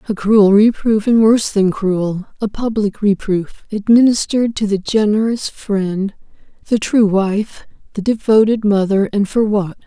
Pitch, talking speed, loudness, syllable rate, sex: 210 Hz, 140 wpm, -15 LUFS, 4.4 syllables/s, female